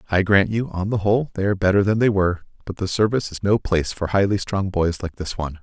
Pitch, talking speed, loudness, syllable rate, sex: 95 Hz, 265 wpm, -21 LUFS, 6.6 syllables/s, male